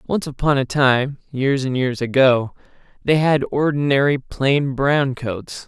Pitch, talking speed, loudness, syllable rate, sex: 135 Hz, 150 wpm, -19 LUFS, 3.7 syllables/s, male